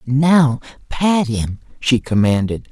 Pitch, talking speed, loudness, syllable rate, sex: 130 Hz, 110 wpm, -17 LUFS, 3.3 syllables/s, male